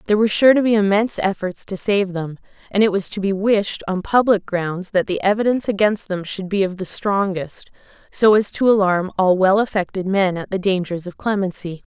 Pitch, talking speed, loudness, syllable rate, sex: 195 Hz, 210 wpm, -19 LUFS, 5.3 syllables/s, female